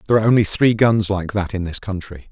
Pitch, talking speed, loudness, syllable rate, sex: 100 Hz, 260 wpm, -18 LUFS, 6.6 syllables/s, male